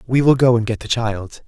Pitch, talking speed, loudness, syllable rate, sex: 115 Hz, 285 wpm, -17 LUFS, 5.3 syllables/s, male